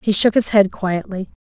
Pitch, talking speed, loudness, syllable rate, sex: 200 Hz, 205 wpm, -16 LUFS, 4.9 syllables/s, female